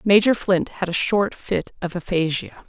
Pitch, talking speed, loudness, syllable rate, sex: 185 Hz, 180 wpm, -21 LUFS, 4.4 syllables/s, female